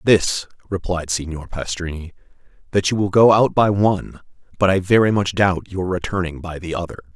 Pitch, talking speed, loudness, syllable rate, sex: 90 Hz, 175 wpm, -19 LUFS, 5.3 syllables/s, male